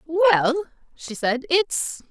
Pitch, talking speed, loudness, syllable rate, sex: 310 Hz, 115 wpm, -21 LUFS, 2.5 syllables/s, female